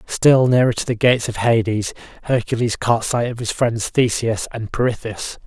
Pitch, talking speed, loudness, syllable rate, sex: 115 Hz, 175 wpm, -19 LUFS, 4.9 syllables/s, male